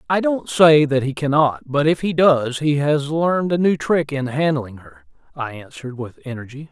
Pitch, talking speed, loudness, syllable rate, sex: 145 Hz, 205 wpm, -18 LUFS, 4.8 syllables/s, male